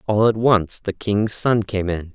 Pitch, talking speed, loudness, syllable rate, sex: 105 Hz, 225 wpm, -20 LUFS, 4.0 syllables/s, male